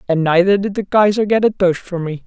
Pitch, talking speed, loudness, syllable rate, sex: 190 Hz, 265 wpm, -16 LUFS, 5.7 syllables/s, female